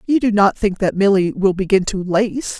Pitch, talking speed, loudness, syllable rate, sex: 200 Hz, 230 wpm, -17 LUFS, 4.9 syllables/s, female